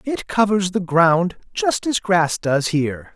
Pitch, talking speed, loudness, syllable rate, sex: 185 Hz, 170 wpm, -19 LUFS, 3.8 syllables/s, male